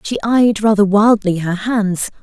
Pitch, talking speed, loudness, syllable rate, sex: 210 Hz, 160 wpm, -14 LUFS, 4.1 syllables/s, female